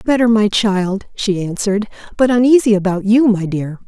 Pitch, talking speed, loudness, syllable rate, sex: 210 Hz, 170 wpm, -15 LUFS, 5.0 syllables/s, female